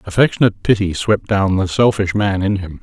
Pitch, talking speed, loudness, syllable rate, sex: 100 Hz, 190 wpm, -16 LUFS, 5.5 syllables/s, male